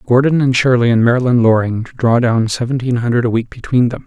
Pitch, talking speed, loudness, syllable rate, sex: 120 Hz, 205 wpm, -14 LUFS, 5.8 syllables/s, male